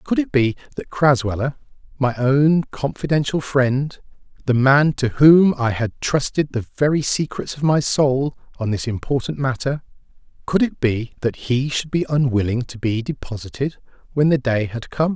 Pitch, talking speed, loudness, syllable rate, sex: 135 Hz, 160 wpm, -20 LUFS, 4.6 syllables/s, male